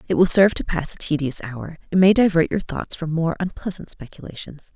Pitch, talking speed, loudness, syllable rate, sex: 165 Hz, 215 wpm, -20 LUFS, 5.7 syllables/s, female